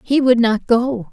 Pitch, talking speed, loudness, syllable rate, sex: 240 Hz, 215 wpm, -15 LUFS, 4.0 syllables/s, female